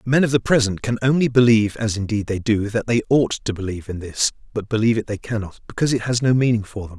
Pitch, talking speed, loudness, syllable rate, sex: 110 Hz, 260 wpm, -20 LUFS, 6.6 syllables/s, male